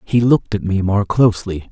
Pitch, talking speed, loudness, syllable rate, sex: 105 Hz, 210 wpm, -16 LUFS, 5.6 syllables/s, male